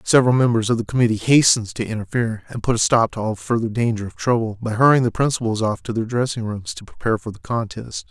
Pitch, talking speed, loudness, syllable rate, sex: 115 Hz, 235 wpm, -20 LUFS, 6.6 syllables/s, male